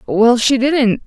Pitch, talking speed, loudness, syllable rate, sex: 245 Hz, 170 wpm, -13 LUFS, 3.3 syllables/s, female